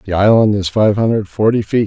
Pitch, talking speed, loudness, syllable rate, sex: 105 Hz, 225 wpm, -14 LUFS, 5.6 syllables/s, male